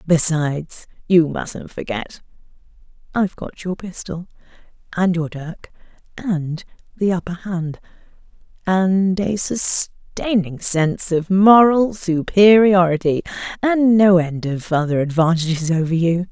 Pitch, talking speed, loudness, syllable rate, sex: 180 Hz, 110 wpm, -18 LUFS, 4.0 syllables/s, female